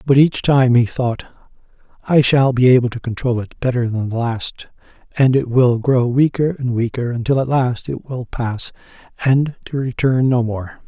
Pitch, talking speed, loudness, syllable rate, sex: 125 Hz, 190 wpm, -17 LUFS, 4.5 syllables/s, male